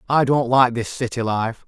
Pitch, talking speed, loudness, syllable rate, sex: 120 Hz, 215 wpm, -19 LUFS, 4.7 syllables/s, male